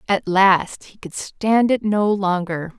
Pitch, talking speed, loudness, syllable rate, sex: 195 Hz, 170 wpm, -18 LUFS, 3.5 syllables/s, female